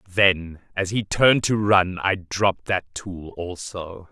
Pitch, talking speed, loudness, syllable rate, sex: 95 Hz, 160 wpm, -22 LUFS, 3.8 syllables/s, male